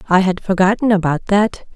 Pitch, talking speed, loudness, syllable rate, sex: 195 Hz, 170 wpm, -16 LUFS, 5.3 syllables/s, female